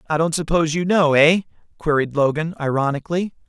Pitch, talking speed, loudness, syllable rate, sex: 160 Hz, 155 wpm, -19 LUFS, 6.2 syllables/s, male